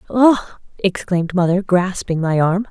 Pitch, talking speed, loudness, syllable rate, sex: 185 Hz, 135 wpm, -17 LUFS, 4.6 syllables/s, female